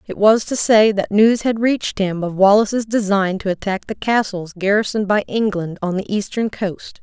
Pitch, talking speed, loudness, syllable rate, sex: 205 Hz, 195 wpm, -18 LUFS, 5.0 syllables/s, female